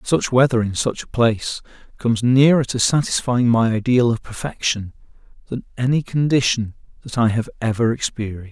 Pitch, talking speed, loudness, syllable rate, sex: 120 Hz, 155 wpm, -19 LUFS, 5.5 syllables/s, male